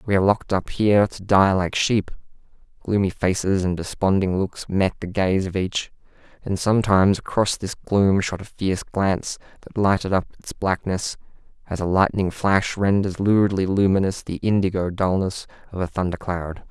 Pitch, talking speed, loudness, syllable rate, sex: 95 Hz, 170 wpm, -22 LUFS, 5.1 syllables/s, male